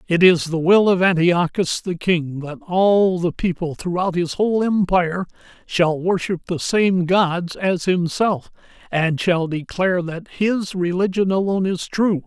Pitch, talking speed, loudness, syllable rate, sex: 180 Hz, 155 wpm, -19 LUFS, 4.3 syllables/s, male